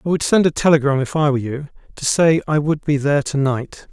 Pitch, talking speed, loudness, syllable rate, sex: 145 Hz, 260 wpm, -17 LUFS, 6.1 syllables/s, male